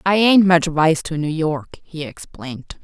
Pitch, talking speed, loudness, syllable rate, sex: 170 Hz, 190 wpm, -17 LUFS, 4.3 syllables/s, female